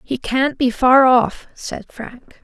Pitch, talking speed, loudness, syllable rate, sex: 250 Hz, 170 wpm, -15 LUFS, 3.1 syllables/s, female